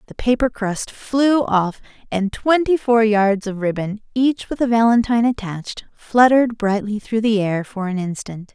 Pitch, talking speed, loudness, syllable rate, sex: 220 Hz, 170 wpm, -18 LUFS, 4.6 syllables/s, female